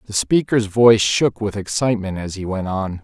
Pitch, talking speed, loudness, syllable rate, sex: 105 Hz, 200 wpm, -18 LUFS, 5.2 syllables/s, male